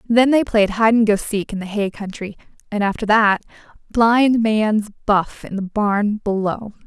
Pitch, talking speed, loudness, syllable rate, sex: 210 Hz, 185 wpm, -18 LUFS, 4.3 syllables/s, female